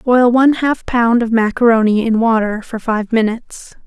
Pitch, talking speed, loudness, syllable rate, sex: 230 Hz, 170 wpm, -14 LUFS, 4.9 syllables/s, female